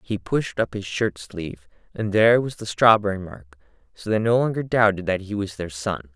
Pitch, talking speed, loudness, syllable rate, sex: 100 Hz, 215 wpm, -22 LUFS, 5.2 syllables/s, male